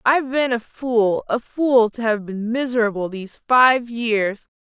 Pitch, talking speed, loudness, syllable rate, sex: 235 Hz, 170 wpm, -19 LUFS, 4.2 syllables/s, female